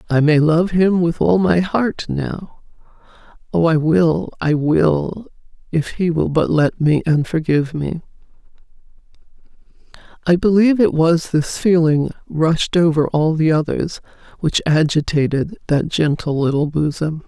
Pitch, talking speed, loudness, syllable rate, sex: 160 Hz, 140 wpm, -17 LUFS, 4.2 syllables/s, female